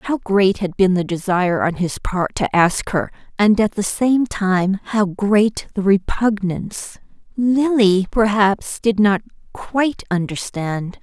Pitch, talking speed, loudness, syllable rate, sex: 200 Hz, 145 wpm, -18 LUFS, 3.7 syllables/s, female